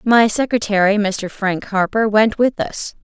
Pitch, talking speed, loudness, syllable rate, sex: 210 Hz, 155 wpm, -17 LUFS, 4.2 syllables/s, female